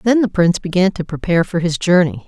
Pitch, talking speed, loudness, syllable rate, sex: 175 Hz, 235 wpm, -16 LUFS, 6.5 syllables/s, female